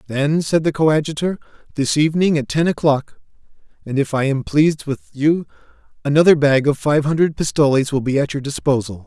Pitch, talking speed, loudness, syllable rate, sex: 145 Hz, 180 wpm, -18 LUFS, 5.7 syllables/s, male